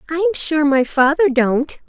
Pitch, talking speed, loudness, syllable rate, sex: 295 Hz, 160 wpm, -16 LUFS, 5.2 syllables/s, female